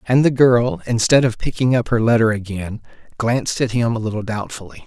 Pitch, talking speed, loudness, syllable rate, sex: 115 Hz, 195 wpm, -18 LUFS, 5.5 syllables/s, male